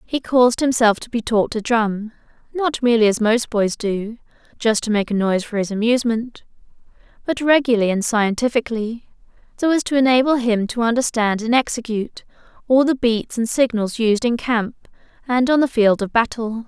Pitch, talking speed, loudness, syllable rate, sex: 230 Hz, 175 wpm, -19 LUFS, 5.3 syllables/s, female